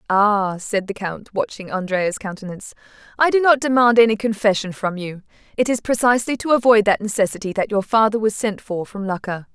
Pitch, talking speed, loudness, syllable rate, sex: 210 Hz, 190 wpm, -19 LUFS, 5.6 syllables/s, female